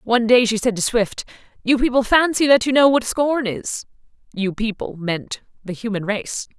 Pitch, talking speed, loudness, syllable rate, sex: 230 Hz, 190 wpm, -19 LUFS, 4.9 syllables/s, female